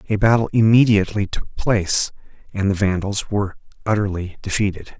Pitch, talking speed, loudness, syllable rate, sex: 100 Hz, 130 wpm, -19 LUFS, 5.8 syllables/s, male